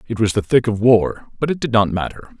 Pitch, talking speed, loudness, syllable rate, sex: 110 Hz, 275 wpm, -18 LUFS, 5.9 syllables/s, male